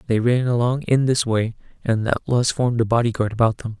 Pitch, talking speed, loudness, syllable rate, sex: 115 Hz, 220 wpm, -20 LUFS, 6.0 syllables/s, male